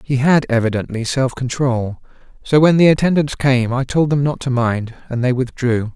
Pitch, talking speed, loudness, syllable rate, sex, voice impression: 130 Hz, 190 wpm, -17 LUFS, 4.8 syllables/s, male, masculine, adult-like, relaxed, slightly powerful, slightly bright, raspy, cool, friendly, wild, kind, slightly modest